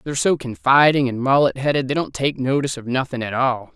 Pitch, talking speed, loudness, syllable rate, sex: 135 Hz, 225 wpm, -19 LUFS, 6.1 syllables/s, male